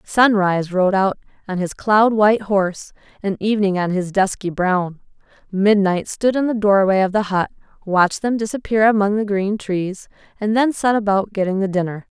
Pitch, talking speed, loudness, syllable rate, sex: 200 Hz, 180 wpm, -18 LUFS, 5.1 syllables/s, female